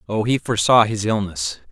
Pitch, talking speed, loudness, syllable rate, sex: 105 Hz, 175 wpm, -19 LUFS, 5.5 syllables/s, male